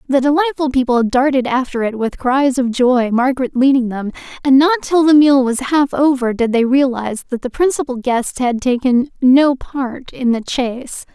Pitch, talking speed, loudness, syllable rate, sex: 260 Hz, 190 wpm, -15 LUFS, 4.8 syllables/s, female